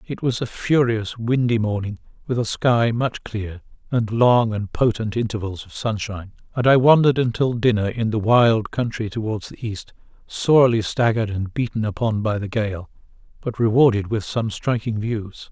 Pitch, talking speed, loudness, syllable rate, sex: 115 Hz, 170 wpm, -21 LUFS, 4.9 syllables/s, male